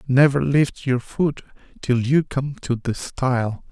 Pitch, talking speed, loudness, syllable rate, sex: 130 Hz, 160 wpm, -21 LUFS, 3.9 syllables/s, male